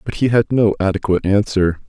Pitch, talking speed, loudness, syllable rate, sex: 100 Hz, 190 wpm, -17 LUFS, 6.0 syllables/s, male